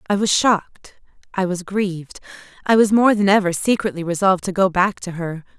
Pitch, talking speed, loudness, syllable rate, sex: 190 Hz, 195 wpm, -18 LUFS, 5.6 syllables/s, female